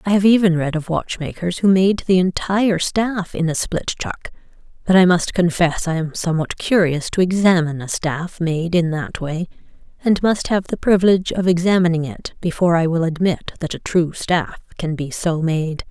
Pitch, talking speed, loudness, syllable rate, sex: 175 Hz, 190 wpm, -18 LUFS, 5.1 syllables/s, female